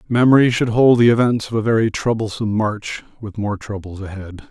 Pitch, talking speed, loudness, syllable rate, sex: 110 Hz, 185 wpm, -17 LUFS, 5.6 syllables/s, male